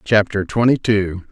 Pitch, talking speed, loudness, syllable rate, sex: 105 Hz, 135 wpm, -17 LUFS, 4.2 syllables/s, male